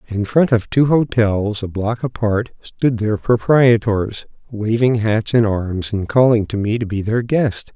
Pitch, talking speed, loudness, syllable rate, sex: 110 Hz, 180 wpm, -17 LUFS, 4.0 syllables/s, male